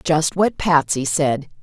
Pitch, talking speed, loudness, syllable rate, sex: 155 Hz, 150 wpm, -18 LUFS, 3.4 syllables/s, female